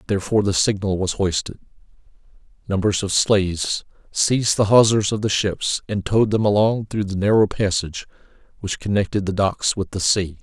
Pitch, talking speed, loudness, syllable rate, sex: 100 Hz, 165 wpm, -20 LUFS, 5.4 syllables/s, male